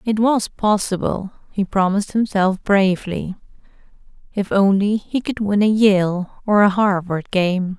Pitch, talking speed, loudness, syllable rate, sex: 200 Hz, 140 wpm, -18 LUFS, 4.2 syllables/s, female